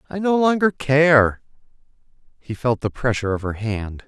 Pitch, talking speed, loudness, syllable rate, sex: 135 Hz, 160 wpm, -19 LUFS, 4.8 syllables/s, male